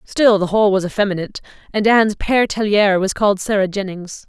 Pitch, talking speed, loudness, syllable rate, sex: 200 Hz, 180 wpm, -16 LUFS, 6.3 syllables/s, female